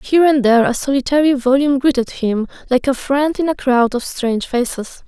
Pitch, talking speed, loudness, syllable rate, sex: 265 Hz, 200 wpm, -16 LUFS, 5.7 syllables/s, female